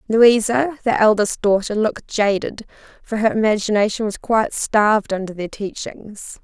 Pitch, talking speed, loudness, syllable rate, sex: 215 Hz, 140 wpm, -18 LUFS, 4.8 syllables/s, female